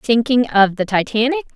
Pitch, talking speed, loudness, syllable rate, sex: 230 Hz, 155 wpm, -16 LUFS, 5.4 syllables/s, female